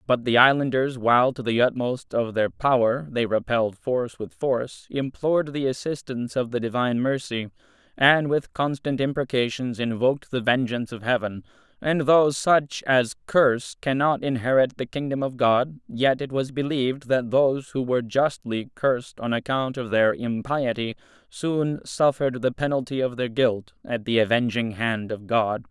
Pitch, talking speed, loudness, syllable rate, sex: 125 Hz, 165 wpm, -23 LUFS, 4.9 syllables/s, male